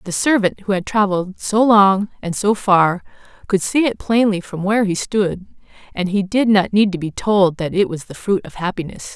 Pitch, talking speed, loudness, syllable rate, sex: 195 Hz, 215 wpm, -17 LUFS, 5.0 syllables/s, female